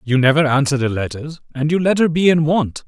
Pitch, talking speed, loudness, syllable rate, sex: 145 Hz, 250 wpm, -16 LUFS, 5.7 syllables/s, male